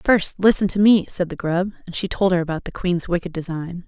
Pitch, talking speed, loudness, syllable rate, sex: 180 Hz, 250 wpm, -20 LUFS, 5.6 syllables/s, female